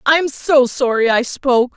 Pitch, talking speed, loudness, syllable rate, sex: 265 Hz, 170 wpm, -15 LUFS, 4.2 syllables/s, female